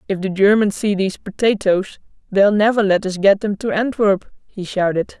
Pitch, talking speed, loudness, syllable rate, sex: 200 Hz, 185 wpm, -17 LUFS, 5.0 syllables/s, female